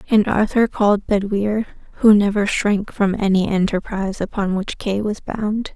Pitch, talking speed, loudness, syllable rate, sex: 205 Hz, 155 wpm, -19 LUFS, 4.7 syllables/s, female